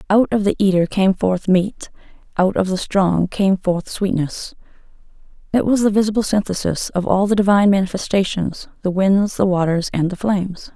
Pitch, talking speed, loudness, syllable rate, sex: 195 Hz, 175 wpm, -18 LUFS, 5.0 syllables/s, female